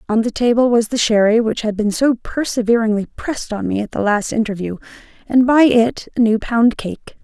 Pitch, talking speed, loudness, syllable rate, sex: 225 Hz, 205 wpm, -16 LUFS, 5.3 syllables/s, female